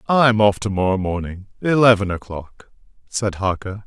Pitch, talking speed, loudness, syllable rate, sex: 105 Hz, 110 wpm, -19 LUFS, 4.7 syllables/s, male